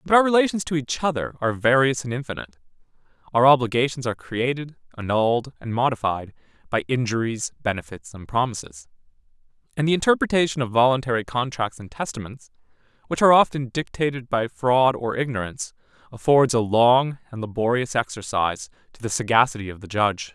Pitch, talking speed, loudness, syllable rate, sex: 125 Hz, 145 wpm, -22 LUFS, 6.0 syllables/s, male